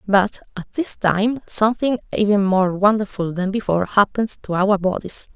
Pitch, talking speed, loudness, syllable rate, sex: 200 Hz, 155 wpm, -19 LUFS, 4.8 syllables/s, female